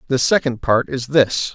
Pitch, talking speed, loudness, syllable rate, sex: 130 Hz, 195 wpm, -17 LUFS, 4.4 syllables/s, male